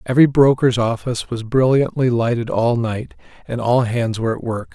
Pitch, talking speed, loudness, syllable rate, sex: 120 Hz, 175 wpm, -18 LUFS, 5.3 syllables/s, male